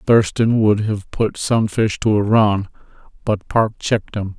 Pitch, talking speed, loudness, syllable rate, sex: 105 Hz, 165 wpm, -18 LUFS, 4.1 syllables/s, male